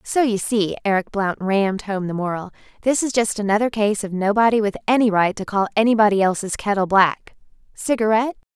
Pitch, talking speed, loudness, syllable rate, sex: 210 Hz, 180 wpm, -20 LUFS, 5.8 syllables/s, female